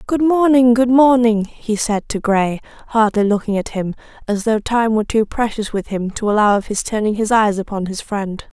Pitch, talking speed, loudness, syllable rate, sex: 220 Hz, 210 wpm, -17 LUFS, 5.0 syllables/s, female